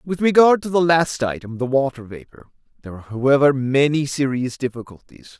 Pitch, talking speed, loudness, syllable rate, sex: 135 Hz, 145 wpm, -18 LUFS, 5.7 syllables/s, male